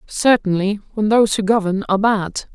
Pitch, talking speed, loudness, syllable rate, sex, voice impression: 205 Hz, 165 wpm, -17 LUFS, 5.5 syllables/s, female, very feminine, adult-like, slightly middle-aged, slightly thin, slightly relaxed, slightly weak, slightly dark, soft, clear, slightly fluent, slightly raspy, cute, very intellectual, refreshing, very sincere, very calm, friendly, very reassuring, very unique, elegant, very sweet, slightly lively, very kind, modest, light